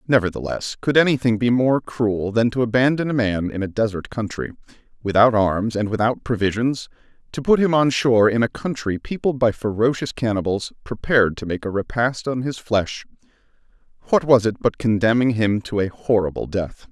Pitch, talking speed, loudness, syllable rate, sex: 115 Hz, 175 wpm, -20 LUFS, 5.3 syllables/s, male